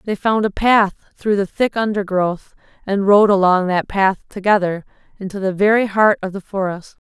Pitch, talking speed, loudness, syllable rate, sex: 200 Hz, 180 wpm, -17 LUFS, 4.9 syllables/s, female